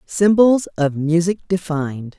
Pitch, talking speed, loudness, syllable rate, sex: 170 Hz, 110 wpm, -18 LUFS, 4.3 syllables/s, female